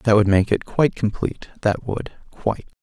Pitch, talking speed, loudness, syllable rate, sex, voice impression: 110 Hz, 190 wpm, -21 LUFS, 5.4 syllables/s, male, masculine, adult-like, slightly relaxed, slightly dark, soft, slightly muffled, sincere, calm, reassuring, slightly sweet, kind, modest